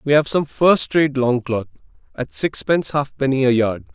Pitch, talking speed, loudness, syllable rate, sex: 135 Hz, 185 wpm, -18 LUFS, 4.9 syllables/s, male